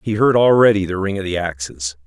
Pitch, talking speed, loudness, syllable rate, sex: 95 Hz, 235 wpm, -17 LUFS, 5.8 syllables/s, male